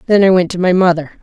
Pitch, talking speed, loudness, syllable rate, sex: 180 Hz, 295 wpm, -12 LUFS, 6.7 syllables/s, female